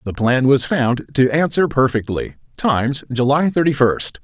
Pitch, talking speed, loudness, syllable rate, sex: 130 Hz, 155 wpm, -17 LUFS, 3.4 syllables/s, male